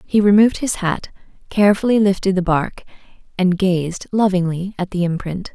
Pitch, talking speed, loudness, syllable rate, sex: 190 Hz, 150 wpm, -18 LUFS, 5.1 syllables/s, female